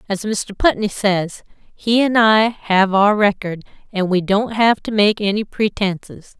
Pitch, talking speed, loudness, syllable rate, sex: 205 Hz, 170 wpm, -17 LUFS, 4.0 syllables/s, female